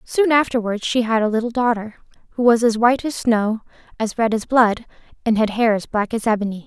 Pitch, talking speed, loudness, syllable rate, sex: 230 Hz, 215 wpm, -19 LUFS, 5.7 syllables/s, female